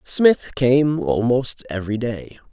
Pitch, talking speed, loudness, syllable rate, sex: 120 Hz, 120 wpm, -19 LUFS, 3.5 syllables/s, male